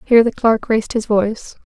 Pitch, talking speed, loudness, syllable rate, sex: 220 Hz, 215 wpm, -16 LUFS, 6.1 syllables/s, female